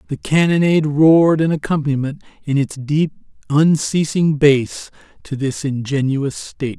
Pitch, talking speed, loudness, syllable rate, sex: 145 Hz, 125 wpm, -17 LUFS, 4.9 syllables/s, male